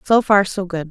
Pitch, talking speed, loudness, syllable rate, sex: 190 Hz, 265 wpm, -17 LUFS, 4.9 syllables/s, female